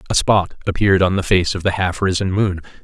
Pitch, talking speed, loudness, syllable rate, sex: 95 Hz, 235 wpm, -17 LUFS, 6.1 syllables/s, male